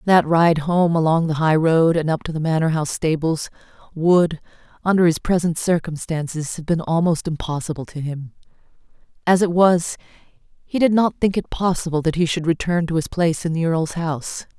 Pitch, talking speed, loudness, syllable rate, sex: 165 Hz, 185 wpm, -20 LUFS, 5.1 syllables/s, female